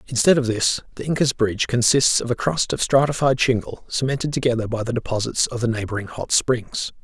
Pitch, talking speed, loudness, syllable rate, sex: 125 Hz, 195 wpm, -21 LUFS, 5.7 syllables/s, male